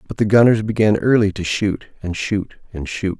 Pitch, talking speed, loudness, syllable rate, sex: 105 Hz, 205 wpm, -18 LUFS, 5.0 syllables/s, male